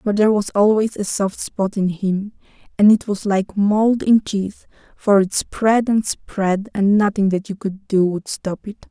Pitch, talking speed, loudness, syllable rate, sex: 205 Hz, 200 wpm, -18 LUFS, 4.2 syllables/s, female